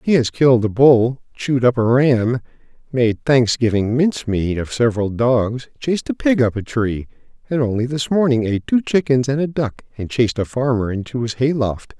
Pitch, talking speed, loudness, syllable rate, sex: 125 Hz, 205 wpm, -18 LUFS, 5.2 syllables/s, male